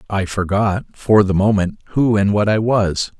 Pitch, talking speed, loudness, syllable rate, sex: 105 Hz, 190 wpm, -17 LUFS, 4.4 syllables/s, male